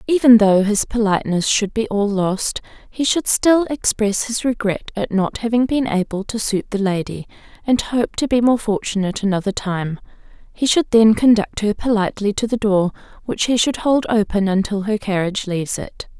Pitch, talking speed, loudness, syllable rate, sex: 215 Hz, 185 wpm, -18 LUFS, 5.1 syllables/s, female